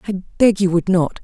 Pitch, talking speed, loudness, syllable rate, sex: 190 Hz, 245 wpm, -16 LUFS, 4.7 syllables/s, female